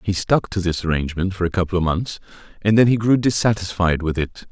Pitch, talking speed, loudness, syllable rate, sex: 95 Hz, 225 wpm, -20 LUFS, 6.0 syllables/s, male